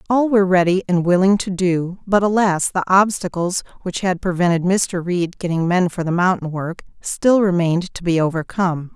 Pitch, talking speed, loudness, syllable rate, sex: 180 Hz, 180 wpm, -18 LUFS, 5.1 syllables/s, female